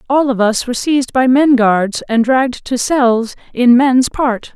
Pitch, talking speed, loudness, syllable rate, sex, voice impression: 250 Hz, 200 wpm, -13 LUFS, 4.4 syllables/s, female, feminine, slightly gender-neutral, slightly thin, tensed, slightly powerful, slightly dark, slightly hard, clear, slightly fluent, slightly cool, intellectual, refreshing, slightly sincere, calm, slightly friendly, slightly reassuring, very unique, slightly elegant, slightly wild, slightly sweet, lively, strict, slightly intense, sharp, light